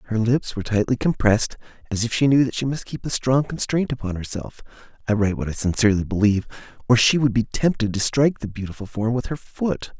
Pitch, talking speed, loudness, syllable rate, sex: 120 Hz, 210 wpm, -22 LUFS, 6.3 syllables/s, male